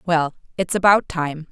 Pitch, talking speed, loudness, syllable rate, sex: 170 Hz, 160 wpm, -20 LUFS, 4.4 syllables/s, female